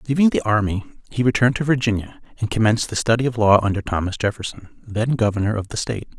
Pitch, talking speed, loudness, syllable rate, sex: 110 Hz, 205 wpm, -20 LUFS, 6.8 syllables/s, male